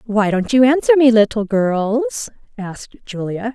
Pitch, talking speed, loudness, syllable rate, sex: 230 Hz, 150 wpm, -15 LUFS, 4.3 syllables/s, female